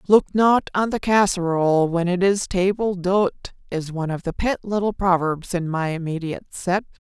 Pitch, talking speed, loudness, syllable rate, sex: 185 Hz, 180 wpm, -21 LUFS, 5.0 syllables/s, female